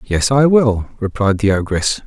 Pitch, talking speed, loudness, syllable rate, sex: 110 Hz, 175 wpm, -15 LUFS, 4.4 syllables/s, male